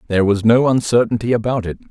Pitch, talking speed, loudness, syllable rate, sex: 115 Hz, 190 wpm, -16 LUFS, 6.8 syllables/s, male